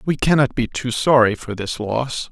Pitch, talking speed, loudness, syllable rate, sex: 120 Hz, 210 wpm, -19 LUFS, 4.6 syllables/s, male